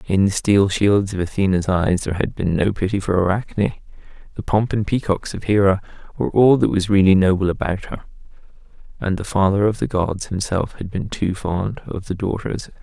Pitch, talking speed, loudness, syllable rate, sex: 100 Hz, 205 wpm, -19 LUFS, 5.5 syllables/s, male